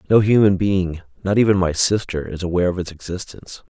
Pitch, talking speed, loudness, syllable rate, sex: 95 Hz, 190 wpm, -19 LUFS, 6.1 syllables/s, male